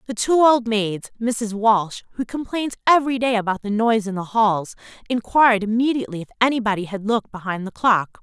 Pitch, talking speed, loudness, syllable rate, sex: 220 Hz, 180 wpm, -20 LUFS, 5.9 syllables/s, female